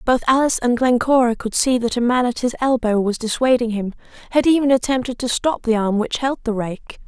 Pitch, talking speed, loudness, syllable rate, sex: 240 Hz, 210 wpm, -18 LUFS, 5.6 syllables/s, female